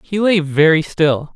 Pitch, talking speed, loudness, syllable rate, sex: 165 Hz, 175 wpm, -15 LUFS, 4.1 syllables/s, male